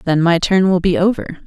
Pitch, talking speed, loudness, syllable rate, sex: 175 Hz, 245 wpm, -15 LUFS, 5.3 syllables/s, female